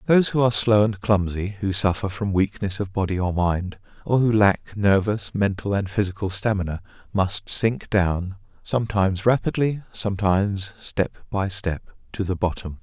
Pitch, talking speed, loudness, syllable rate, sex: 100 Hz, 160 wpm, -23 LUFS, 5.0 syllables/s, male